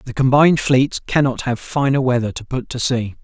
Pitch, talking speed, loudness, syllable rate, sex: 130 Hz, 205 wpm, -17 LUFS, 5.3 syllables/s, male